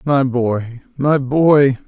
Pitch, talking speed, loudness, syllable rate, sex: 135 Hz, 130 wpm, -15 LUFS, 2.9 syllables/s, male